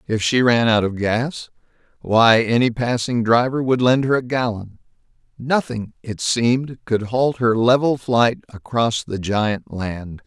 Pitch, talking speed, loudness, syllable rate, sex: 120 Hz, 150 wpm, -19 LUFS, 4.0 syllables/s, male